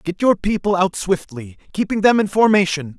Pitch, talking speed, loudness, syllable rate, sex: 190 Hz, 180 wpm, -17 LUFS, 5.1 syllables/s, male